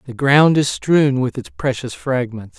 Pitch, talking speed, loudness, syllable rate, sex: 130 Hz, 185 wpm, -17 LUFS, 4.2 syllables/s, male